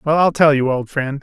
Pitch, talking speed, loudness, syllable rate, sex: 145 Hz, 295 wpm, -16 LUFS, 5.0 syllables/s, male